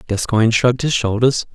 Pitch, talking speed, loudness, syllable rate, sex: 115 Hz, 155 wpm, -16 LUFS, 6.0 syllables/s, male